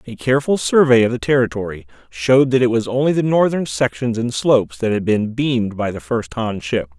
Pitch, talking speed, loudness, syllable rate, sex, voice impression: 120 Hz, 215 wpm, -17 LUFS, 5.6 syllables/s, male, very masculine, very adult-like, middle-aged, very thick, tensed, powerful, bright, slightly hard, clear, fluent, slightly raspy, cool, very intellectual, slightly refreshing, very sincere, calm, very mature, friendly, very reassuring, slightly unique, very elegant, wild, slightly sweet, lively, kind, slightly modest